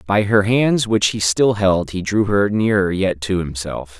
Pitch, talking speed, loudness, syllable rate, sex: 100 Hz, 210 wpm, -17 LUFS, 4.2 syllables/s, male